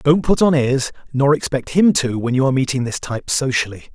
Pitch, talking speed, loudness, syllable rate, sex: 135 Hz, 230 wpm, -18 LUFS, 5.8 syllables/s, male